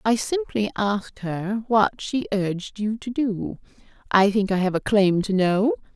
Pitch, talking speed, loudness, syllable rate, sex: 205 Hz, 170 wpm, -23 LUFS, 4.2 syllables/s, female